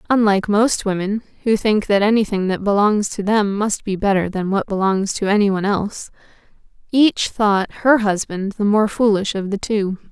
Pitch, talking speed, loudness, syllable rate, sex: 205 Hz, 165 wpm, -18 LUFS, 4.9 syllables/s, female